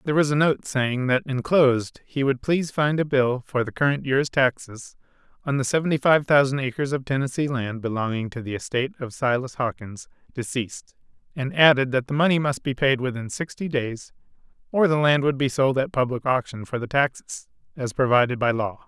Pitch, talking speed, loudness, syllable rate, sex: 135 Hz, 195 wpm, -23 LUFS, 5.5 syllables/s, male